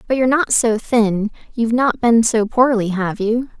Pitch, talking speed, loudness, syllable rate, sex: 230 Hz, 185 wpm, -17 LUFS, 4.8 syllables/s, female